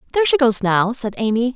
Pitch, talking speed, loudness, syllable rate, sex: 240 Hz, 230 wpm, -17 LUFS, 6.5 syllables/s, female